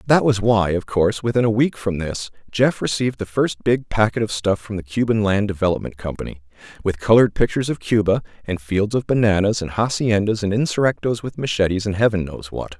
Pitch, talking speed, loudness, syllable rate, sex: 105 Hz, 200 wpm, -20 LUFS, 5.9 syllables/s, male